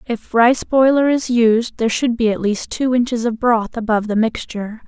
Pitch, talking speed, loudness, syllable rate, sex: 235 Hz, 210 wpm, -17 LUFS, 5.1 syllables/s, female